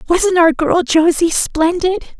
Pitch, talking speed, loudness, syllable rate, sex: 335 Hz, 135 wpm, -14 LUFS, 3.9 syllables/s, female